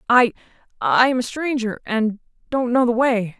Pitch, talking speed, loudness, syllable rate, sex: 235 Hz, 140 wpm, -20 LUFS, 4.6 syllables/s, female